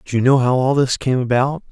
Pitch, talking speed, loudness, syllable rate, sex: 130 Hz, 280 wpm, -17 LUFS, 5.8 syllables/s, male